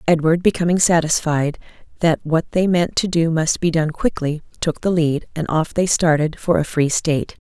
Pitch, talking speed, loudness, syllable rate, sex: 165 Hz, 195 wpm, -18 LUFS, 4.9 syllables/s, female